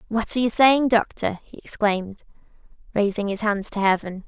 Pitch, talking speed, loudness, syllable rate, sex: 215 Hz, 170 wpm, -22 LUFS, 5.4 syllables/s, female